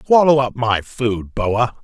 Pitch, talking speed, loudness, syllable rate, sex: 120 Hz, 165 wpm, -17 LUFS, 3.6 syllables/s, male